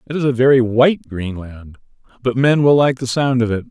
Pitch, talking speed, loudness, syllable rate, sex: 125 Hz, 225 wpm, -16 LUFS, 5.5 syllables/s, male